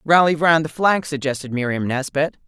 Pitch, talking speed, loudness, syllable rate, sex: 150 Hz, 170 wpm, -19 LUFS, 5.2 syllables/s, female